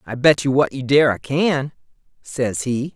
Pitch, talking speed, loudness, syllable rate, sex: 135 Hz, 205 wpm, -19 LUFS, 4.2 syllables/s, male